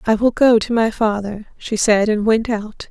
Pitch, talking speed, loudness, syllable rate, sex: 220 Hz, 225 wpm, -17 LUFS, 4.5 syllables/s, female